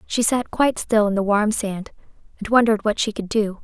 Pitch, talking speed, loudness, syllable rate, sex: 215 Hz, 230 wpm, -20 LUFS, 5.6 syllables/s, female